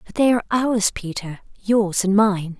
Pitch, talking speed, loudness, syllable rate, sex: 205 Hz, 185 wpm, -20 LUFS, 4.4 syllables/s, female